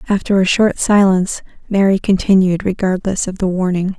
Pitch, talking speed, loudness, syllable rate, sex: 190 Hz, 150 wpm, -15 LUFS, 5.3 syllables/s, female